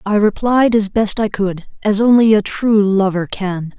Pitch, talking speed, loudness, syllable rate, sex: 205 Hz, 175 wpm, -15 LUFS, 4.2 syllables/s, female